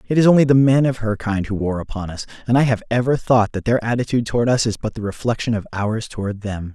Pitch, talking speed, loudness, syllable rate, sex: 115 Hz, 265 wpm, -19 LUFS, 6.4 syllables/s, male